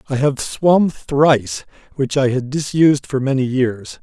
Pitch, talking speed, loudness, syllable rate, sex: 140 Hz, 165 wpm, -17 LUFS, 4.3 syllables/s, male